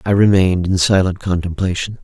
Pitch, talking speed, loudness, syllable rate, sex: 95 Hz, 145 wpm, -16 LUFS, 5.8 syllables/s, male